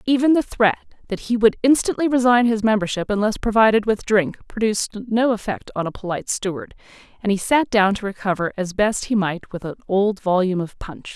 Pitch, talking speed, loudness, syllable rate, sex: 210 Hz, 200 wpm, -20 LUFS, 5.6 syllables/s, female